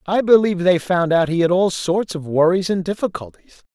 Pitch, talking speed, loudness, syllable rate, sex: 180 Hz, 210 wpm, -18 LUFS, 5.4 syllables/s, female